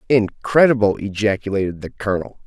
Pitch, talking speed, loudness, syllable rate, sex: 105 Hz, 95 wpm, -19 LUFS, 5.7 syllables/s, male